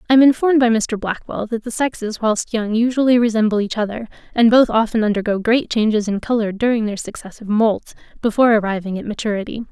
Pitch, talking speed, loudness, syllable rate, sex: 220 Hz, 190 wpm, -18 LUFS, 6.3 syllables/s, female